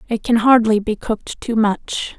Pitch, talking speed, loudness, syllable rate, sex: 225 Hz, 190 wpm, -17 LUFS, 4.5 syllables/s, female